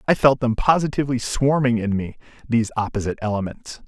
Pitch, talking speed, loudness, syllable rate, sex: 120 Hz, 155 wpm, -21 LUFS, 6.3 syllables/s, male